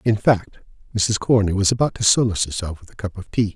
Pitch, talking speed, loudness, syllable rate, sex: 105 Hz, 235 wpm, -20 LUFS, 6.2 syllables/s, male